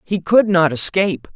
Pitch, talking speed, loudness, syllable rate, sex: 180 Hz, 175 wpm, -16 LUFS, 4.9 syllables/s, female